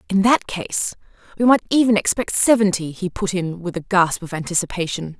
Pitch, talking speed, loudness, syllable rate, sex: 190 Hz, 185 wpm, -19 LUFS, 5.4 syllables/s, female